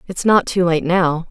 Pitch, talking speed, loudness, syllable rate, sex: 175 Hz, 230 wpm, -16 LUFS, 4.3 syllables/s, female